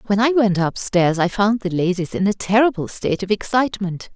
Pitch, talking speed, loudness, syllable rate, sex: 200 Hz, 215 wpm, -19 LUFS, 5.5 syllables/s, female